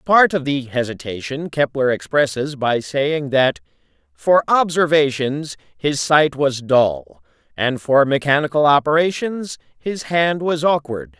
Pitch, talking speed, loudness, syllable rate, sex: 140 Hz, 125 wpm, -18 LUFS, 4.0 syllables/s, male